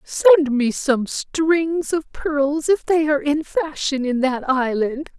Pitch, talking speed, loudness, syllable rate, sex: 290 Hz, 160 wpm, -19 LUFS, 3.4 syllables/s, female